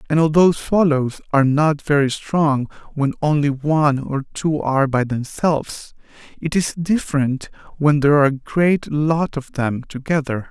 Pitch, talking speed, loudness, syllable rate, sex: 145 Hz, 155 wpm, -19 LUFS, 4.7 syllables/s, male